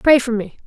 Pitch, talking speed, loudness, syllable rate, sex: 245 Hz, 270 wpm, -18 LUFS, 5.3 syllables/s, female